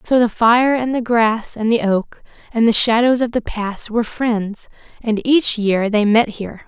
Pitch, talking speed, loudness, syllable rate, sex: 225 Hz, 205 wpm, -17 LUFS, 4.4 syllables/s, female